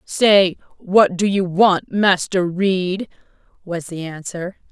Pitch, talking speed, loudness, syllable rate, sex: 185 Hz, 125 wpm, -18 LUFS, 3.2 syllables/s, female